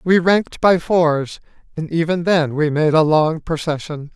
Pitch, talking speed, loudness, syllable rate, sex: 160 Hz, 175 wpm, -17 LUFS, 4.4 syllables/s, male